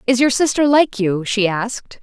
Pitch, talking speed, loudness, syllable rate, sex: 230 Hz, 205 wpm, -16 LUFS, 4.8 syllables/s, female